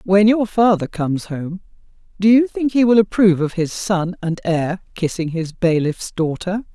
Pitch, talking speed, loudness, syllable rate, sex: 185 Hz, 180 wpm, -18 LUFS, 4.6 syllables/s, female